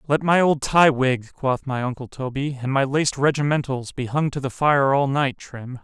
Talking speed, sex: 215 wpm, male